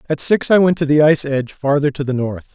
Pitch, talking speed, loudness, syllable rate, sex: 145 Hz, 285 wpm, -16 LUFS, 6.3 syllables/s, male